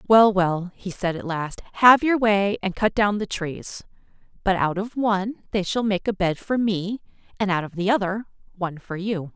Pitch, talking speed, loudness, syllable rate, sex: 195 Hz, 210 wpm, -23 LUFS, 4.9 syllables/s, female